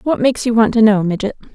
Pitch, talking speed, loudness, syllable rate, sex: 225 Hz, 270 wpm, -15 LUFS, 6.9 syllables/s, female